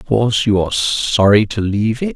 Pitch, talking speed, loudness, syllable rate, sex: 110 Hz, 195 wpm, -15 LUFS, 5.9 syllables/s, male